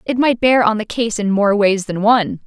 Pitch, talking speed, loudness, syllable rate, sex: 215 Hz, 270 wpm, -15 LUFS, 5.2 syllables/s, female